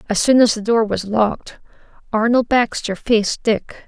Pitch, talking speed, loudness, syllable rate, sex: 220 Hz, 170 wpm, -17 LUFS, 4.7 syllables/s, female